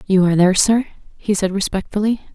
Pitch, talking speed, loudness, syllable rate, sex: 200 Hz, 180 wpm, -17 LUFS, 6.8 syllables/s, female